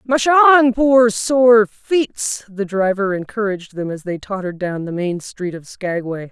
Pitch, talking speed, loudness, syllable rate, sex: 210 Hz, 170 wpm, -17 LUFS, 4.2 syllables/s, female